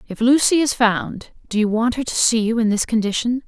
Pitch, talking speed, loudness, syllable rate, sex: 230 Hz, 240 wpm, -18 LUFS, 5.4 syllables/s, female